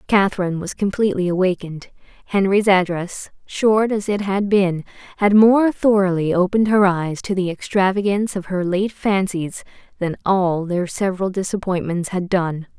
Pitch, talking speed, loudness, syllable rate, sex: 190 Hz, 145 wpm, -19 LUFS, 5.0 syllables/s, female